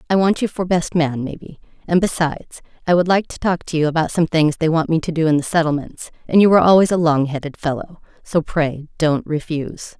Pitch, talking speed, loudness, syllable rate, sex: 165 Hz, 235 wpm, -18 LUFS, 5.8 syllables/s, female